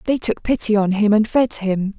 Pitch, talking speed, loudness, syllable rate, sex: 210 Hz, 240 wpm, -18 LUFS, 4.9 syllables/s, female